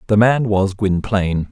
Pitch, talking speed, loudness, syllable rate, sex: 100 Hz, 160 wpm, -17 LUFS, 4.6 syllables/s, male